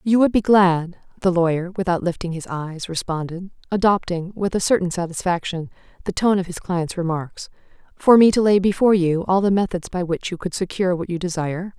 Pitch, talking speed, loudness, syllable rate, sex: 180 Hz, 200 wpm, -20 LUFS, 5.7 syllables/s, female